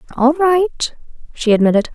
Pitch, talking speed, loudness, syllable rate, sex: 280 Hz, 125 wpm, -15 LUFS, 4.9 syllables/s, female